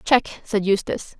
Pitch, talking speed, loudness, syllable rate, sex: 210 Hz, 150 wpm, -22 LUFS, 4.7 syllables/s, female